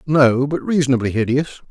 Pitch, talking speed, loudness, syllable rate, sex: 135 Hz, 140 wpm, -17 LUFS, 5.8 syllables/s, male